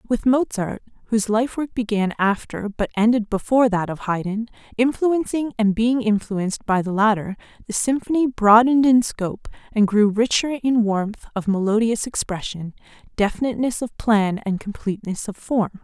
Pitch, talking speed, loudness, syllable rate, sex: 220 Hz, 150 wpm, -21 LUFS, 4.9 syllables/s, female